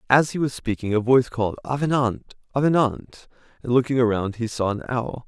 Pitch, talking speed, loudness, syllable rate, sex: 120 Hz, 180 wpm, -22 LUFS, 5.8 syllables/s, male